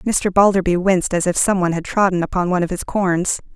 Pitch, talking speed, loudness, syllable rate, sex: 185 Hz, 235 wpm, -18 LUFS, 6.2 syllables/s, female